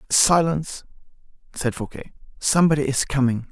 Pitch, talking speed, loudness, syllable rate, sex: 140 Hz, 105 wpm, -21 LUFS, 5.5 syllables/s, male